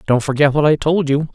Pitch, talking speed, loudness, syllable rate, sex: 145 Hz, 265 wpm, -16 LUFS, 6.0 syllables/s, male